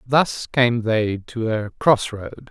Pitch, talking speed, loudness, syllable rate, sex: 115 Hz, 145 wpm, -20 LUFS, 2.9 syllables/s, male